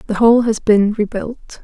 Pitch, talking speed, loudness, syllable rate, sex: 220 Hz, 185 wpm, -15 LUFS, 4.9 syllables/s, female